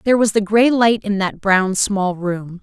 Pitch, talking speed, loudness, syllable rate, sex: 205 Hz, 230 wpm, -17 LUFS, 4.4 syllables/s, female